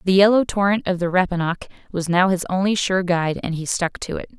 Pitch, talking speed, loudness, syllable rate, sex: 185 Hz, 235 wpm, -20 LUFS, 6.3 syllables/s, female